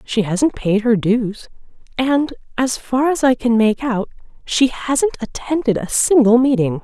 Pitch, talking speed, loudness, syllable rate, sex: 240 Hz, 165 wpm, -17 LUFS, 4.1 syllables/s, female